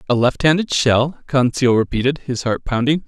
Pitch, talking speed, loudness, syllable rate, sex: 130 Hz, 155 wpm, -17 LUFS, 5.0 syllables/s, male